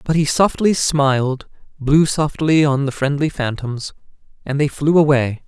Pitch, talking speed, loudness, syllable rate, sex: 145 Hz, 155 wpm, -17 LUFS, 4.4 syllables/s, male